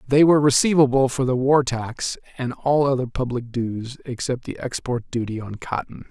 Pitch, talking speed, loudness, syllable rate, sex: 130 Hz, 175 wpm, -22 LUFS, 5.0 syllables/s, male